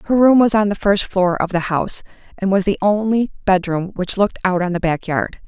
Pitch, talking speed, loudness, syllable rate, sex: 195 Hz, 240 wpm, -17 LUFS, 5.6 syllables/s, female